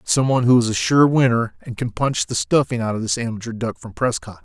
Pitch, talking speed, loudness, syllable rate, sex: 120 Hz, 255 wpm, -19 LUFS, 5.9 syllables/s, male